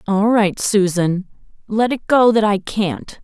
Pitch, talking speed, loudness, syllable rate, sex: 205 Hz, 165 wpm, -17 LUFS, 3.7 syllables/s, female